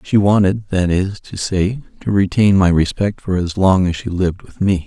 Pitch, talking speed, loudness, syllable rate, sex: 95 Hz, 220 wpm, -17 LUFS, 4.8 syllables/s, male